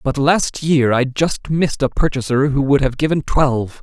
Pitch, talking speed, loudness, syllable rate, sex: 140 Hz, 205 wpm, -17 LUFS, 4.9 syllables/s, male